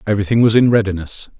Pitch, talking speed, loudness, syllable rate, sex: 105 Hz, 170 wpm, -15 LUFS, 7.4 syllables/s, male